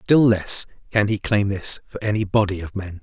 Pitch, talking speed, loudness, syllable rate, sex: 100 Hz, 220 wpm, -20 LUFS, 4.8 syllables/s, male